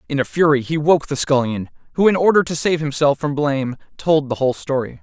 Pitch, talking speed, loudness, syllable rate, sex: 145 Hz, 225 wpm, -18 LUFS, 5.9 syllables/s, male